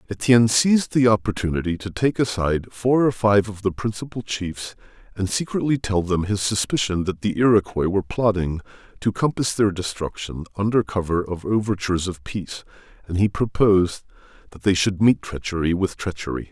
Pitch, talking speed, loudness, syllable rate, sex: 100 Hz, 165 wpm, -22 LUFS, 5.5 syllables/s, male